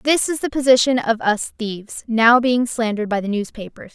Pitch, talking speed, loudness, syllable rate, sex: 230 Hz, 200 wpm, -18 LUFS, 5.4 syllables/s, female